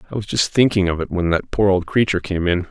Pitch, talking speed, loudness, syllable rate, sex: 95 Hz, 290 wpm, -19 LUFS, 6.5 syllables/s, male